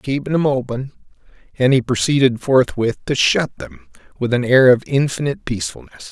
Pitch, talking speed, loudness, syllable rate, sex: 125 Hz, 145 wpm, -17 LUFS, 4.9 syllables/s, male